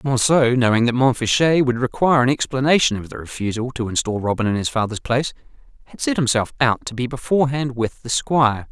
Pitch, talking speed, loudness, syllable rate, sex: 125 Hz, 195 wpm, -19 LUFS, 6.0 syllables/s, male